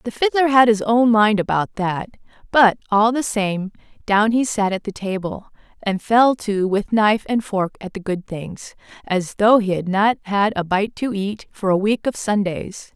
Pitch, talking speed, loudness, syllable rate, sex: 210 Hz, 205 wpm, -19 LUFS, 4.4 syllables/s, female